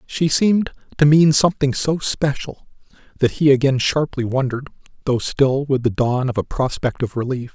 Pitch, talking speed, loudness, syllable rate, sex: 135 Hz, 175 wpm, -18 LUFS, 5.1 syllables/s, male